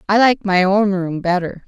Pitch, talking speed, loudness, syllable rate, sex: 195 Hz, 215 wpm, -16 LUFS, 4.7 syllables/s, female